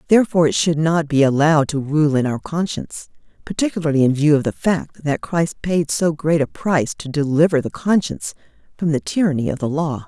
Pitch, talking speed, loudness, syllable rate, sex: 155 Hz, 205 wpm, -18 LUFS, 5.8 syllables/s, female